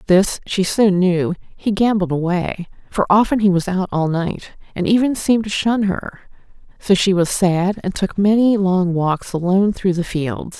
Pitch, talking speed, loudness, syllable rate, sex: 190 Hz, 185 wpm, -18 LUFS, 4.5 syllables/s, female